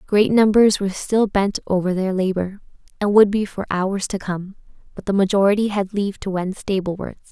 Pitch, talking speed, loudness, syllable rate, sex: 195 Hz, 190 wpm, -19 LUFS, 5.4 syllables/s, female